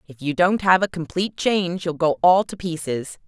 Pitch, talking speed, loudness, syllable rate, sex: 175 Hz, 220 wpm, -21 LUFS, 5.3 syllables/s, female